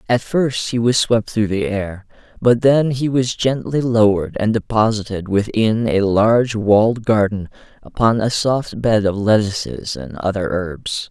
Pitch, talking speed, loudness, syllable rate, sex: 110 Hz, 160 wpm, -17 LUFS, 4.3 syllables/s, male